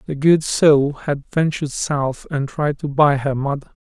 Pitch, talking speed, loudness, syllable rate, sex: 145 Hz, 190 wpm, -19 LUFS, 4.3 syllables/s, male